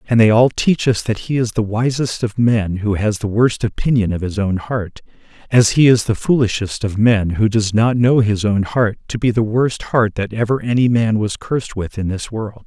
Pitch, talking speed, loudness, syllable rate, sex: 110 Hz, 235 wpm, -17 LUFS, 4.9 syllables/s, male